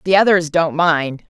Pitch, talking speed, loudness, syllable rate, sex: 165 Hz, 175 wpm, -15 LUFS, 4.4 syllables/s, female